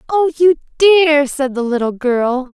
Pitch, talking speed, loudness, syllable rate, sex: 285 Hz, 165 wpm, -14 LUFS, 3.9 syllables/s, female